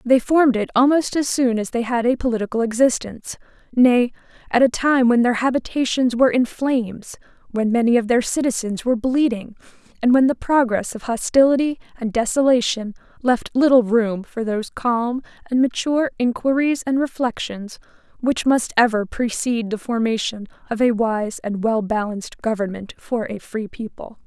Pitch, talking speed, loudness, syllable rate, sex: 240 Hz, 160 wpm, -20 LUFS, 5.2 syllables/s, female